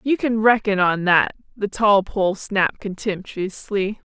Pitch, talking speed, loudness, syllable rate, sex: 205 Hz, 145 wpm, -20 LUFS, 4.1 syllables/s, female